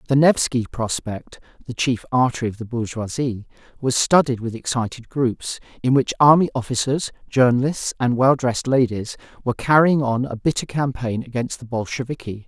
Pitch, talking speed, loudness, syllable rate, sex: 125 Hz, 155 wpm, -20 LUFS, 5.2 syllables/s, male